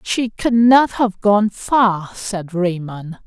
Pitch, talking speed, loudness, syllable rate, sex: 205 Hz, 145 wpm, -17 LUFS, 2.9 syllables/s, female